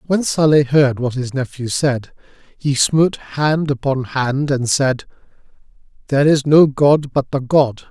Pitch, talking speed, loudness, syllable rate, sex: 140 Hz, 160 wpm, -16 LUFS, 4.1 syllables/s, male